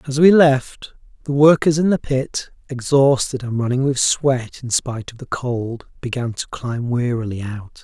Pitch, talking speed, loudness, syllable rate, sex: 130 Hz, 175 wpm, -18 LUFS, 4.5 syllables/s, male